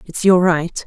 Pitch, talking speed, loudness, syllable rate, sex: 175 Hz, 210 wpm, -15 LUFS, 4.0 syllables/s, female